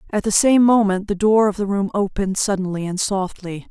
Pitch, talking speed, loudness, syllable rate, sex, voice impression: 200 Hz, 210 wpm, -18 LUFS, 5.5 syllables/s, female, feminine, adult-like, relaxed, slightly dark, soft, slightly raspy, intellectual, calm, reassuring, elegant, kind, modest